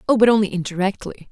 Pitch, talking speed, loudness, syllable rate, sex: 200 Hz, 185 wpm, -19 LUFS, 7.0 syllables/s, female